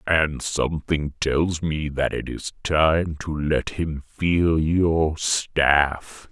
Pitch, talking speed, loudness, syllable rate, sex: 80 Hz, 135 wpm, -22 LUFS, 2.7 syllables/s, male